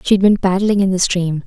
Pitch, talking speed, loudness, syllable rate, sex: 190 Hz, 245 wpm, -15 LUFS, 5.1 syllables/s, female